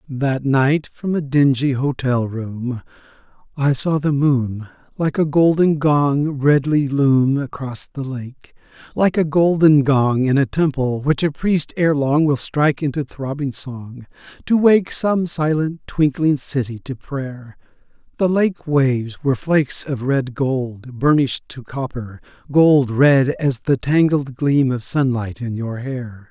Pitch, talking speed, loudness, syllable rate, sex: 140 Hz, 155 wpm, -18 LUFS, 3.8 syllables/s, male